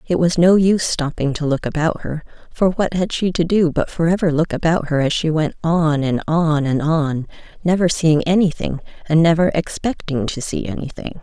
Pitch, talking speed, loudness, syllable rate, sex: 160 Hz, 205 wpm, -18 LUFS, 5.0 syllables/s, female